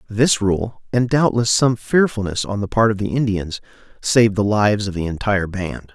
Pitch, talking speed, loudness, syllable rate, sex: 105 Hz, 190 wpm, -18 LUFS, 5.2 syllables/s, male